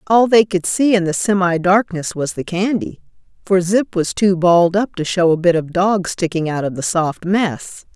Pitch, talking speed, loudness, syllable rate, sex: 185 Hz, 220 wpm, -16 LUFS, 4.7 syllables/s, female